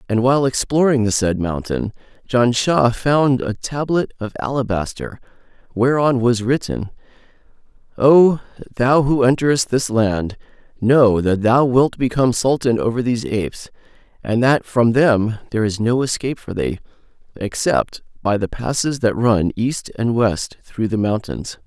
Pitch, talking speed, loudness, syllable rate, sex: 120 Hz, 145 wpm, -18 LUFS, 4.4 syllables/s, male